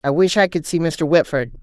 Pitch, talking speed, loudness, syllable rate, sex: 160 Hz, 260 wpm, -18 LUFS, 5.4 syllables/s, female